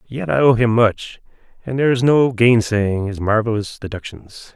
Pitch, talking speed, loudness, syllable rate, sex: 115 Hz, 170 wpm, -17 LUFS, 4.8 syllables/s, male